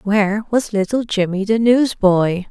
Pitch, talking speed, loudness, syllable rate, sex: 210 Hz, 145 wpm, -17 LUFS, 4.3 syllables/s, female